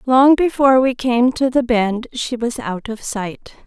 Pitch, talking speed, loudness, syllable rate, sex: 245 Hz, 195 wpm, -17 LUFS, 4.1 syllables/s, female